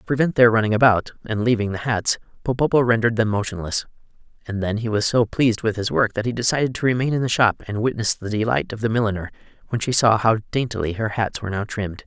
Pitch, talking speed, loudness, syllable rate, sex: 110 Hz, 235 wpm, -21 LUFS, 6.5 syllables/s, male